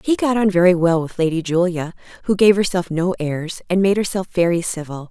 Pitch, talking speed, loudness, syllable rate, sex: 180 Hz, 210 wpm, -18 LUFS, 5.5 syllables/s, female